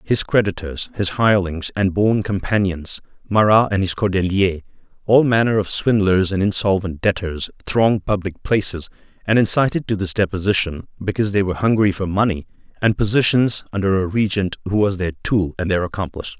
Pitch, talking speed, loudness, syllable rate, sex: 100 Hz, 160 wpm, -19 LUFS, 5.5 syllables/s, male